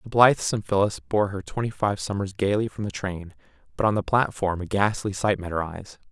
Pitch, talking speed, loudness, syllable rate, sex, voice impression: 100 Hz, 215 wpm, -24 LUFS, 5.7 syllables/s, male, masculine, adult-like, cool, slightly intellectual, slightly refreshing, calm